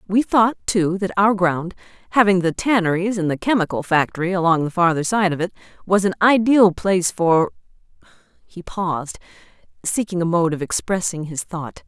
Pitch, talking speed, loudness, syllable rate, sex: 185 Hz, 165 wpm, -19 LUFS, 5.2 syllables/s, female